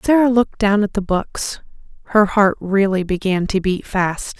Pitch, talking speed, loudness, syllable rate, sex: 200 Hz, 175 wpm, -18 LUFS, 4.5 syllables/s, female